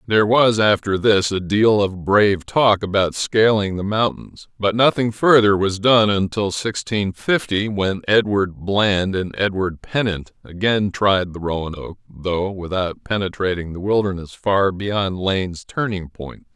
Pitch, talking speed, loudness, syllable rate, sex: 100 Hz, 150 wpm, -19 LUFS, 4.3 syllables/s, male